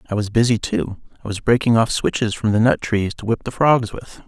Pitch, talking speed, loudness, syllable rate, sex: 110 Hz, 255 wpm, -19 LUFS, 5.4 syllables/s, male